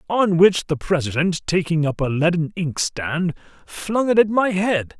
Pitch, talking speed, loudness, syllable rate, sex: 175 Hz, 170 wpm, -20 LUFS, 4.3 syllables/s, male